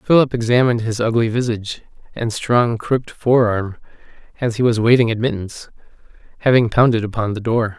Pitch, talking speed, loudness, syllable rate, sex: 115 Hz, 155 wpm, -17 LUFS, 5.8 syllables/s, male